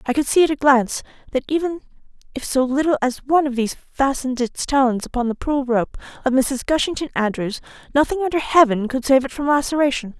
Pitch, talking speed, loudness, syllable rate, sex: 270 Hz, 200 wpm, -20 LUFS, 6.2 syllables/s, female